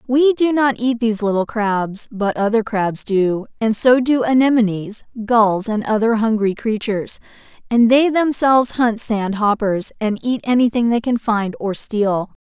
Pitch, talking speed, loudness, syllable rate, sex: 225 Hz, 165 wpm, -17 LUFS, 4.4 syllables/s, female